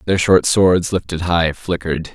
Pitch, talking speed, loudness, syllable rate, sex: 85 Hz, 170 wpm, -16 LUFS, 4.5 syllables/s, male